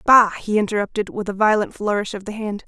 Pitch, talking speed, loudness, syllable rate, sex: 210 Hz, 225 wpm, -20 LUFS, 5.9 syllables/s, female